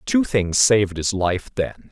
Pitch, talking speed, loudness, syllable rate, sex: 105 Hz, 190 wpm, -20 LUFS, 3.9 syllables/s, male